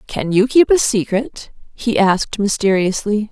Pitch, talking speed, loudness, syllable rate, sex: 215 Hz, 145 wpm, -16 LUFS, 4.4 syllables/s, female